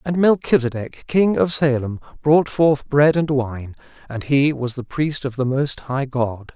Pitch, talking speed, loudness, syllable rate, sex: 140 Hz, 185 wpm, -19 LUFS, 4.1 syllables/s, male